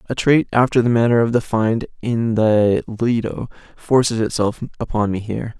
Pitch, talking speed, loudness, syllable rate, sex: 115 Hz, 170 wpm, -18 LUFS, 4.8 syllables/s, male